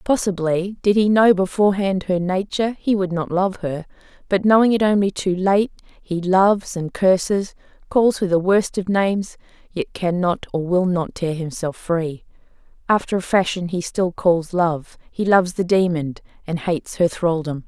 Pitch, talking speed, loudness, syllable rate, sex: 185 Hz, 175 wpm, -20 LUFS, 4.7 syllables/s, female